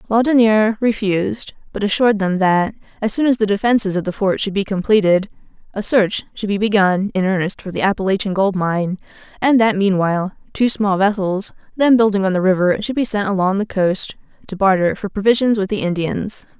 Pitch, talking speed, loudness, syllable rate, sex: 200 Hz, 190 wpm, -17 LUFS, 5.6 syllables/s, female